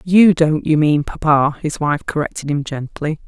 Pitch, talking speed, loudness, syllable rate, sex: 155 Hz, 185 wpm, -17 LUFS, 4.5 syllables/s, female